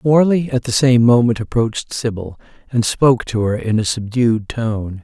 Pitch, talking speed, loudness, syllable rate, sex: 115 Hz, 180 wpm, -16 LUFS, 4.8 syllables/s, male